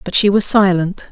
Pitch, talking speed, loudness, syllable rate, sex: 190 Hz, 215 wpm, -13 LUFS, 5.3 syllables/s, female